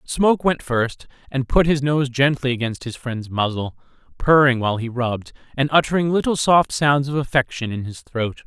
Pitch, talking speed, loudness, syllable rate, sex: 135 Hz, 185 wpm, -20 LUFS, 5.1 syllables/s, male